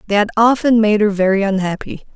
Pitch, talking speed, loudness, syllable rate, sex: 210 Hz, 195 wpm, -15 LUFS, 6.1 syllables/s, female